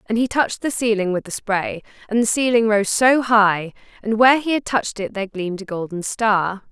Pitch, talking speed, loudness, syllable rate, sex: 215 Hz, 225 wpm, -19 LUFS, 5.5 syllables/s, female